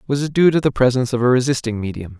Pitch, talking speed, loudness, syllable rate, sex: 130 Hz, 275 wpm, -17 LUFS, 7.4 syllables/s, male